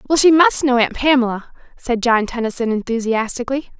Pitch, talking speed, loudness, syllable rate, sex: 245 Hz, 160 wpm, -17 LUFS, 5.8 syllables/s, female